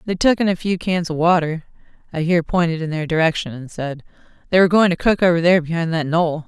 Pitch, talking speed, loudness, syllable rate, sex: 170 Hz, 240 wpm, -18 LUFS, 6.5 syllables/s, female